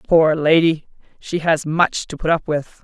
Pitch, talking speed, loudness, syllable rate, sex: 160 Hz, 190 wpm, -18 LUFS, 4.3 syllables/s, female